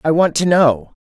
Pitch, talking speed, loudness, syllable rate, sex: 170 Hz, 235 wpm, -14 LUFS, 4.6 syllables/s, female